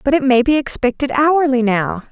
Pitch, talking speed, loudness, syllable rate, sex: 265 Hz, 200 wpm, -15 LUFS, 5.1 syllables/s, female